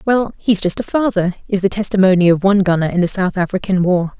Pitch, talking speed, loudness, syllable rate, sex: 190 Hz, 230 wpm, -15 LUFS, 6.2 syllables/s, female